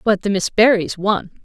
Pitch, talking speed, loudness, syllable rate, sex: 200 Hz, 210 wpm, -17 LUFS, 4.8 syllables/s, female